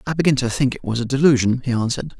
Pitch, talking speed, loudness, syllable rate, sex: 130 Hz, 275 wpm, -19 LUFS, 7.4 syllables/s, male